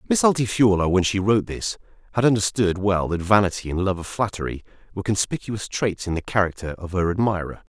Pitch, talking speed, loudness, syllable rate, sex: 100 Hz, 185 wpm, -22 LUFS, 6.1 syllables/s, male